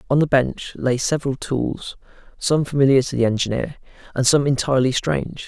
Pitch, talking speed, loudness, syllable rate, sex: 135 Hz, 165 wpm, -20 LUFS, 5.6 syllables/s, male